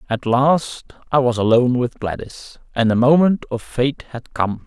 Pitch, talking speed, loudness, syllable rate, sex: 125 Hz, 180 wpm, -18 LUFS, 4.5 syllables/s, male